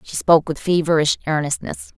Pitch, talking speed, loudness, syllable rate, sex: 155 Hz, 150 wpm, -18 LUFS, 5.8 syllables/s, female